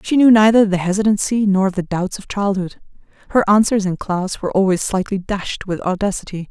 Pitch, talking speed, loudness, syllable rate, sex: 195 Hz, 185 wpm, -17 LUFS, 5.5 syllables/s, female